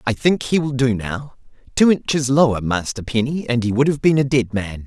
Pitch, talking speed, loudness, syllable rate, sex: 125 Hz, 235 wpm, -19 LUFS, 5.3 syllables/s, male